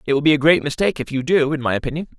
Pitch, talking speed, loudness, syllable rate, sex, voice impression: 145 Hz, 330 wpm, -18 LUFS, 8.1 syllables/s, male, masculine, adult-like, thick, tensed, powerful, bright, slightly soft, clear, fluent, cool, very intellectual, refreshing, sincere, slightly calm, friendly, reassuring, unique, elegant, slightly wild, lively, slightly strict, intense, sharp